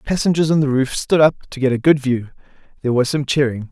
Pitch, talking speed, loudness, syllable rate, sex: 135 Hz, 245 wpm, -17 LUFS, 6.5 syllables/s, male